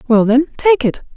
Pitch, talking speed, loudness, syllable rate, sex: 270 Hz, 205 wpm, -14 LUFS, 5.0 syllables/s, female